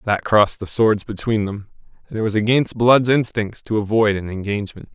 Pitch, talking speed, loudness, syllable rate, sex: 110 Hz, 195 wpm, -19 LUFS, 5.4 syllables/s, male